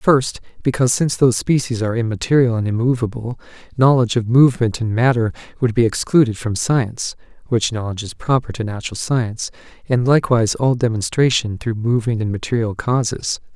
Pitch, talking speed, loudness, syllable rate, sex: 120 Hz, 155 wpm, -18 LUFS, 5.2 syllables/s, male